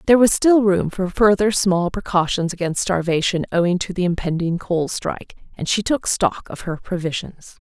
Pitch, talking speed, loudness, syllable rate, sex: 185 Hz, 180 wpm, -19 LUFS, 5.1 syllables/s, female